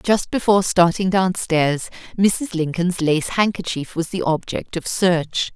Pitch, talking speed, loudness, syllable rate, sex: 180 Hz, 140 wpm, -19 LUFS, 4.1 syllables/s, female